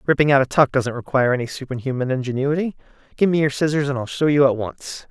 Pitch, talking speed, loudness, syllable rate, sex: 135 Hz, 225 wpm, -20 LUFS, 6.6 syllables/s, male